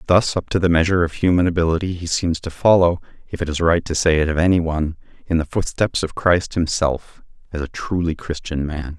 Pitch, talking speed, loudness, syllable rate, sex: 85 Hz, 220 wpm, -19 LUFS, 5.8 syllables/s, male